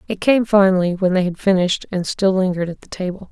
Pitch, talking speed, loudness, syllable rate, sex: 190 Hz, 235 wpm, -18 LUFS, 6.4 syllables/s, female